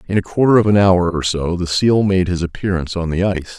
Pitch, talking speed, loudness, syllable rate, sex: 90 Hz, 270 wpm, -16 LUFS, 6.4 syllables/s, male